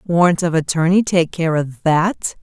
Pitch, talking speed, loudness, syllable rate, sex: 170 Hz, 150 wpm, -17 LUFS, 4.4 syllables/s, female